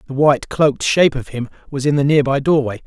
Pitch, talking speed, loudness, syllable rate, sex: 140 Hz, 230 wpm, -16 LUFS, 6.4 syllables/s, male